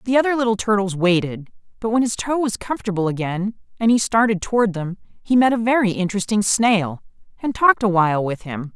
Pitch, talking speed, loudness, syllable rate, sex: 205 Hz, 200 wpm, -19 LUFS, 5.9 syllables/s, female